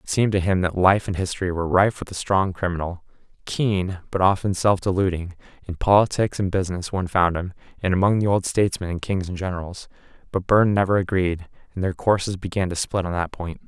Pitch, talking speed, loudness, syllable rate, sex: 95 Hz, 210 wpm, -22 LUFS, 6.0 syllables/s, male